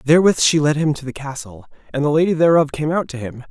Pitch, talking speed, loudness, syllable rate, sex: 150 Hz, 255 wpm, -17 LUFS, 6.5 syllables/s, male